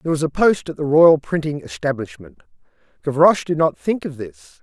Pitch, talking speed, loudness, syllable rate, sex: 150 Hz, 195 wpm, -18 LUFS, 5.6 syllables/s, male